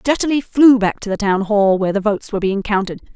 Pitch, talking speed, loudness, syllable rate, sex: 210 Hz, 245 wpm, -16 LUFS, 6.4 syllables/s, female